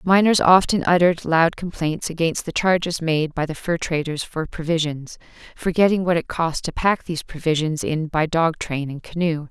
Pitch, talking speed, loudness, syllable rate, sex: 165 Hz, 185 wpm, -21 LUFS, 5.0 syllables/s, female